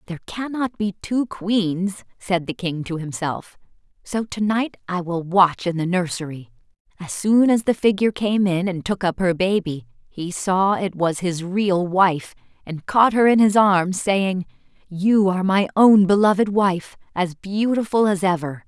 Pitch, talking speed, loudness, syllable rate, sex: 190 Hz, 175 wpm, -20 LUFS, 4.3 syllables/s, female